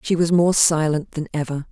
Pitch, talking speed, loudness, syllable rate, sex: 160 Hz, 210 wpm, -19 LUFS, 5.1 syllables/s, female